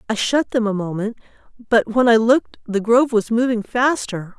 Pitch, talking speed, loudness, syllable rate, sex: 230 Hz, 190 wpm, -18 LUFS, 5.3 syllables/s, female